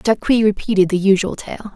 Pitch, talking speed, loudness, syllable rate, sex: 205 Hz, 170 wpm, -16 LUFS, 5.3 syllables/s, female